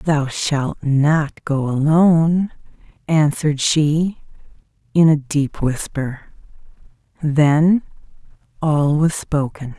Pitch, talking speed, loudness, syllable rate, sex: 150 Hz, 90 wpm, -18 LUFS, 3.1 syllables/s, female